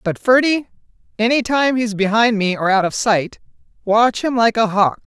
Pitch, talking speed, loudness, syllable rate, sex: 225 Hz, 185 wpm, -16 LUFS, 4.7 syllables/s, female